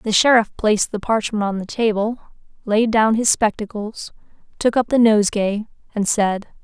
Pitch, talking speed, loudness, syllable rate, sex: 215 Hz, 165 wpm, -18 LUFS, 4.9 syllables/s, female